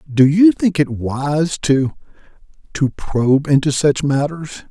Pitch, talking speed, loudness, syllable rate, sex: 145 Hz, 125 wpm, -16 LUFS, 3.7 syllables/s, male